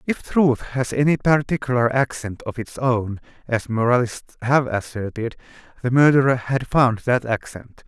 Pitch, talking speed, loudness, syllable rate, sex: 125 Hz, 145 wpm, -20 LUFS, 4.6 syllables/s, male